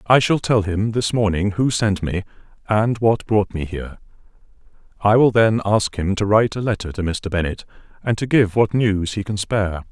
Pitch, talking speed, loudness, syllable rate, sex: 105 Hz, 205 wpm, -19 LUFS, 5.1 syllables/s, male